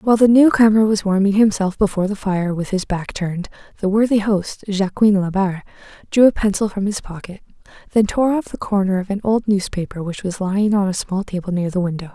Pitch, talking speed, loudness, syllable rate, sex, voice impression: 200 Hz, 210 wpm, -18 LUFS, 5.9 syllables/s, female, feminine, slightly adult-like, slightly soft, muffled, slightly cute, calm, friendly, slightly sweet, slightly kind